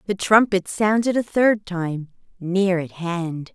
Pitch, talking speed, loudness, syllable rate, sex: 190 Hz, 150 wpm, -20 LUFS, 3.5 syllables/s, female